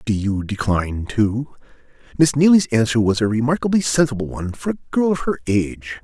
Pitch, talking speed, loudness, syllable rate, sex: 120 Hz, 180 wpm, -19 LUFS, 5.6 syllables/s, male